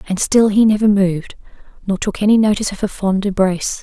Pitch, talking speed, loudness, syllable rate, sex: 200 Hz, 205 wpm, -15 LUFS, 6.3 syllables/s, female